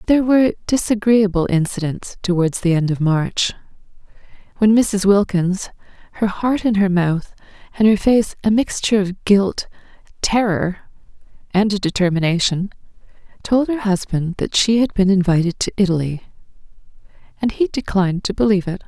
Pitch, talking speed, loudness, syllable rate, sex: 195 Hz, 135 wpm, -18 LUFS, 5.1 syllables/s, female